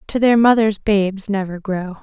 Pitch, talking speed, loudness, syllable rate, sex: 205 Hz, 180 wpm, -17 LUFS, 4.8 syllables/s, female